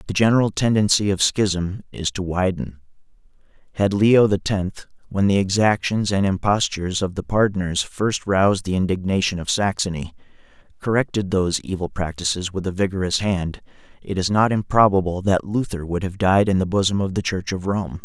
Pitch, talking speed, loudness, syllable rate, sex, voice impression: 95 Hz, 175 wpm, -21 LUFS, 5.4 syllables/s, male, masculine, adult-like, thick, tensed, slightly weak, clear, fluent, cool, intellectual, calm, wild, modest